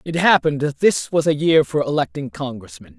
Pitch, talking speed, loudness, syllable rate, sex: 150 Hz, 200 wpm, -18 LUFS, 5.5 syllables/s, male